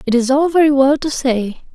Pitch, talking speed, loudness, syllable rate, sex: 270 Hz, 240 wpm, -14 LUFS, 5.3 syllables/s, female